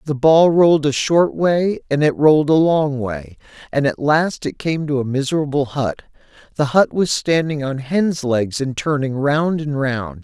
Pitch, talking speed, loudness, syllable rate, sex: 145 Hz, 195 wpm, -17 LUFS, 4.4 syllables/s, male